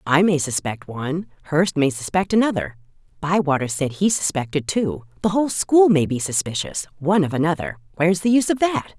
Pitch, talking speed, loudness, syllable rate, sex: 165 Hz, 180 wpm, -20 LUFS, 5.8 syllables/s, female